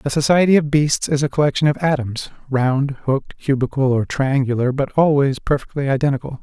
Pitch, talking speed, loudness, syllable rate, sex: 140 Hz, 170 wpm, -18 LUFS, 5.6 syllables/s, male